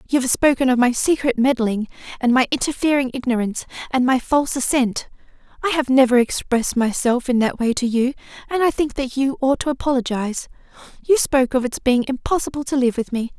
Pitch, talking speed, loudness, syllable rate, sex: 260 Hz, 195 wpm, -19 LUFS, 6.0 syllables/s, female